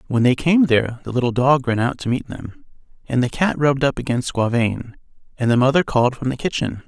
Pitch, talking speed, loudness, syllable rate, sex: 130 Hz, 225 wpm, -19 LUFS, 5.8 syllables/s, male